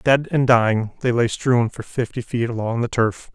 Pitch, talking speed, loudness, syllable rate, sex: 120 Hz, 215 wpm, -20 LUFS, 4.7 syllables/s, male